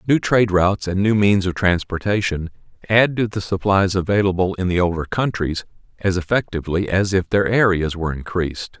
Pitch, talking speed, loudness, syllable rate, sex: 95 Hz, 170 wpm, -19 LUFS, 5.6 syllables/s, male